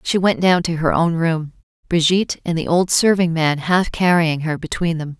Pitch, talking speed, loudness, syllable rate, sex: 170 Hz, 210 wpm, -18 LUFS, 4.9 syllables/s, female